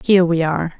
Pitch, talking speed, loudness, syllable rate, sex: 170 Hz, 225 wpm, -17 LUFS, 7.6 syllables/s, female